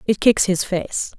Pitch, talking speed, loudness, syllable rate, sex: 195 Hz, 200 wpm, -19 LUFS, 4.0 syllables/s, female